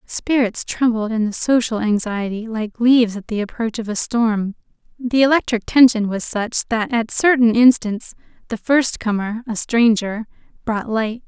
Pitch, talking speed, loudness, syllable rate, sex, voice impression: 225 Hz, 160 wpm, -18 LUFS, 4.5 syllables/s, female, feminine, slightly adult-like, calm, friendly, slightly elegant